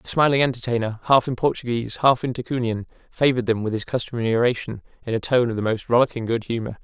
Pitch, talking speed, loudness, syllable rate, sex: 120 Hz, 210 wpm, -22 LUFS, 7.0 syllables/s, male